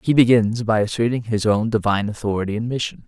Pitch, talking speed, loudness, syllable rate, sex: 110 Hz, 195 wpm, -20 LUFS, 6.4 syllables/s, male